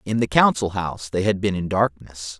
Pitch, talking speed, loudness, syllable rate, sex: 95 Hz, 225 wpm, -21 LUFS, 5.3 syllables/s, male